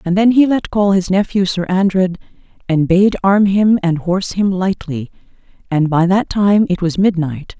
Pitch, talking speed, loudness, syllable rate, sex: 185 Hz, 190 wpm, -15 LUFS, 4.6 syllables/s, female